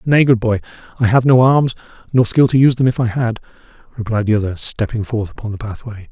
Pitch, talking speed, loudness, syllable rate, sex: 115 Hz, 225 wpm, -16 LUFS, 6.2 syllables/s, male